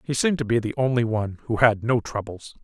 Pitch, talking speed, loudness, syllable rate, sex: 115 Hz, 250 wpm, -23 LUFS, 6.5 syllables/s, male